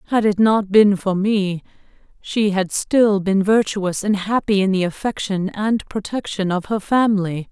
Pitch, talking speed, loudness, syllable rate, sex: 200 Hz, 170 wpm, -18 LUFS, 4.3 syllables/s, female